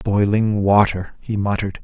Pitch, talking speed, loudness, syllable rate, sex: 100 Hz, 130 wpm, -18 LUFS, 4.8 syllables/s, male